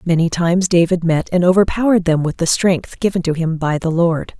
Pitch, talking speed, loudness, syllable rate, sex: 175 Hz, 220 wpm, -16 LUFS, 5.6 syllables/s, female